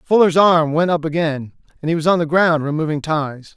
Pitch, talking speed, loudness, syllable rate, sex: 160 Hz, 220 wpm, -17 LUFS, 5.4 syllables/s, male